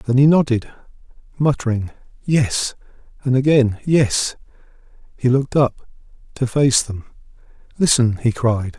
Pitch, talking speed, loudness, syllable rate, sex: 125 Hz, 115 wpm, -18 LUFS, 4.4 syllables/s, male